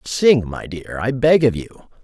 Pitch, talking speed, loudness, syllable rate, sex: 120 Hz, 205 wpm, -17 LUFS, 4.0 syllables/s, male